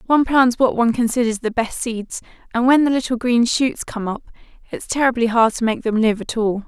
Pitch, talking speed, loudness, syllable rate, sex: 235 Hz, 225 wpm, -18 LUFS, 5.6 syllables/s, female